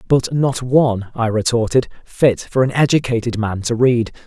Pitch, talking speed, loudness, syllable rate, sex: 120 Hz, 170 wpm, -17 LUFS, 4.8 syllables/s, male